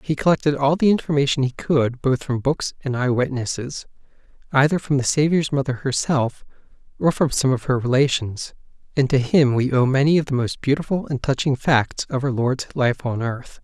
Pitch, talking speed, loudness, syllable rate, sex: 135 Hz, 185 wpm, -20 LUFS, 5.2 syllables/s, male